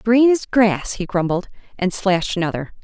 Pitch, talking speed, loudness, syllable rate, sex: 200 Hz, 150 wpm, -19 LUFS, 4.6 syllables/s, female